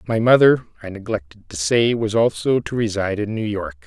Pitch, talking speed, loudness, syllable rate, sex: 115 Hz, 200 wpm, -19 LUFS, 5.4 syllables/s, male